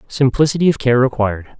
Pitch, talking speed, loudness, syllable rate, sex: 130 Hz, 150 wpm, -15 LUFS, 6.3 syllables/s, male